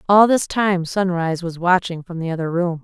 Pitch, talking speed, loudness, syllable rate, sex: 180 Hz, 210 wpm, -19 LUFS, 5.3 syllables/s, female